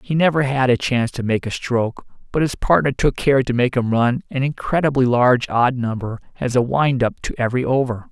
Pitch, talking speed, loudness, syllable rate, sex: 125 Hz, 220 wpm, -19 LUFS, 5.6 syllables/s, male